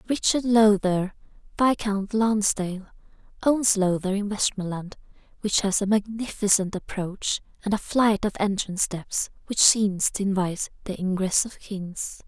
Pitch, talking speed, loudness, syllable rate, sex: 200 Hz, 130 wpm, -24 LUFS, 4.4 syllables/s, female